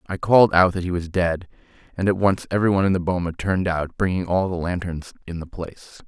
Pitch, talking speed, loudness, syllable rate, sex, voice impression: 90 Hz, 225 wpm, -21 LUFS, 6.2 syllables/s, male, masculine, middle-aged, tensed, powerful, hard, slightly soft, slightly fluent, raspy, cool, intellectual, slightly calm, mature, slightly reassuring, wild, slightly strict